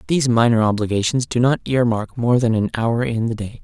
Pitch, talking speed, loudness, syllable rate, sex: 115 Hz, 215 wpm, -18 LUFS, 5.6 syllables/s, male